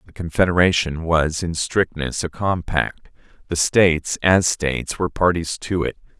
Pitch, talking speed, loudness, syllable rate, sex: 85 Hz, 145 wpm, -20 LUFS, 4.6 syllables/s, male